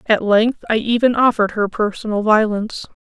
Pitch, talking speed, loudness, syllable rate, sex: 220 Hz, 160 wpm, -17 LUFS, 5.5 syllables/s, female